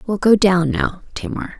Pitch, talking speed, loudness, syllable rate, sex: 195 Hz, 190 wpm, -17 LUFS, 4.5 syllables/s, female